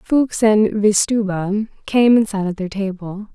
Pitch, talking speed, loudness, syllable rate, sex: 205 Hz, 160 wpm, -17 LUFS, 3.9 syllables/s, female